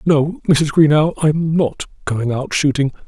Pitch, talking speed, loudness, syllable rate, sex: 145 Hz, 155 wpm, -16 LUFS, 3.7 syllables/s, male